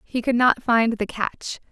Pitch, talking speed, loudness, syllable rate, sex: 230 Hz, 210 wpm, -21 LUFS, 4.0 syllables/s, female